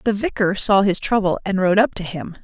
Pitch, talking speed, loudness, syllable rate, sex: 195 Hz, 245 wpm, -18 LUFS, 5.4 syllables/s, female